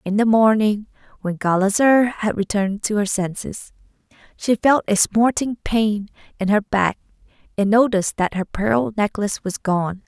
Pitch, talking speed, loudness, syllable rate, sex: 205 Hz, 155 wpm, -19 LUFS, 4.6 syllables/s, female